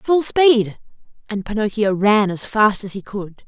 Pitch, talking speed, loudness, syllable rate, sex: 215 Hz, 175 wpm, -17 LUFS, 4.1 syllables/s, female